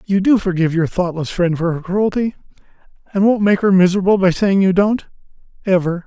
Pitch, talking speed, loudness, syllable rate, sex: 190 Hz, 180 wpm, -16 LUFS, 5.9 syllables/s, male